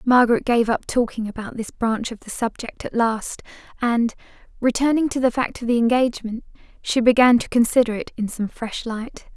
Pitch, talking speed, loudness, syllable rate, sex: 235 Hz, 185 wpm, -21 LUFS, 5.3 syllables/s, female